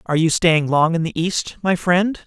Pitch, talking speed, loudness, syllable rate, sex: 170 Hz, 240 wpm, -18 LUFS, 4.7 syllables/s, male